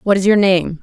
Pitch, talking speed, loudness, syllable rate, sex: 190 Hz, 290 wpm, -13 LUFS, 5.1 syllables/s, female